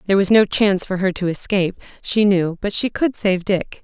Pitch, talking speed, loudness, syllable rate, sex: 195 Hz, 235 wpm, -18 LUFS, 5.6 syllables/s, female